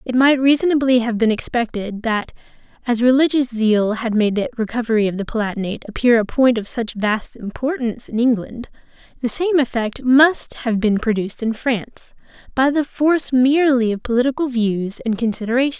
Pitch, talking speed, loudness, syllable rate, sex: 240 Hz, 165 wpm, -18 LUFS, 5.5 syllables/s, female